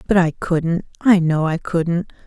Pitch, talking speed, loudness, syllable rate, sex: 175 Hz, 185 wpm, -19 LUFS, 3.8 syllables/s, female